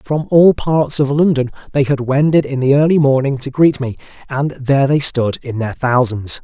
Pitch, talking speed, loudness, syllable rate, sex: 135 Hz, 205 wpm, -15 LUFS, 4.9 syllables/s, male